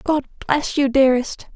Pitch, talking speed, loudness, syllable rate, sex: 275 Hz, 155 wpm, -19 LUFS, 5.3 syllables/s, female